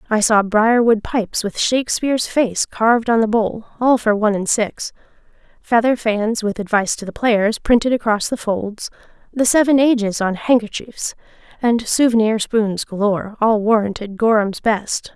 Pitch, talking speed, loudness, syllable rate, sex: 220 Hz, 160 wpm, -17 LUFS, 4.8 syllables/s, female